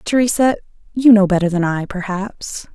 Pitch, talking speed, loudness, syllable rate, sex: 205 Hz, 155 wpm, -16 LUFS, 4.8 syllables/s, female